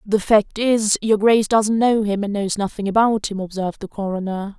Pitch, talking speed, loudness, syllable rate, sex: 210 Hz, 210 wpm, -19 LUFS, 5.2 syllables/s, female